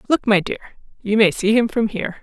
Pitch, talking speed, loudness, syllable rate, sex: 215 Hz, 245 wpm, -18 LUFS, 6.2 syllables/s, female